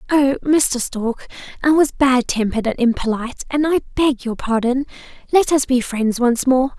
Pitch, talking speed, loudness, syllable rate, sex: 260 Hz, 175 wpm, -18 LUFS, 4.7 syllables/s, female